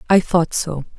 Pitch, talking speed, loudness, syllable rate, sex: 170 Hz, 185 wpm, -18 LUFS, 4.4 syllables/s, female